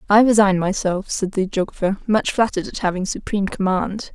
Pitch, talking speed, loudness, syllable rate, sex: 195 Hz, 175 wpm, -20 LUFS, 5.7 syllables/s, female